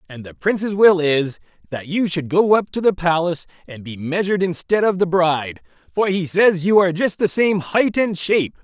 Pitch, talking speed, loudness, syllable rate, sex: 175 Hz, 215 wpm, -18 LUFS, 5.3 syllables/s, male